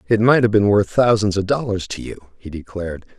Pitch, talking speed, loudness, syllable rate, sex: 100 Hz, 225 wpm, -18 LUFS, 5.6 syllables/s, male